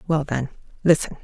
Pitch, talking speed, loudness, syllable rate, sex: 150 Hz, 145 wpm, -22 LUFS, 6.3 syllables/s, female